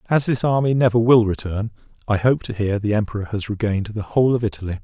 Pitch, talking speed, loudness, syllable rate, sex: 110 Hz, 225 wpm, -20 LUFS, 6.4 syllables/s, male